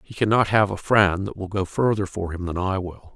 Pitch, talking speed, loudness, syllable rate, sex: 95 Hz, 265 wpm, -22 LUFS, 5.3 syllables/s, male